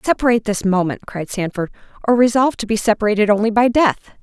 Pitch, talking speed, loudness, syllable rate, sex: 220 Hz, 170 wpm, -17 LUFS, 6.8 syllables/s, female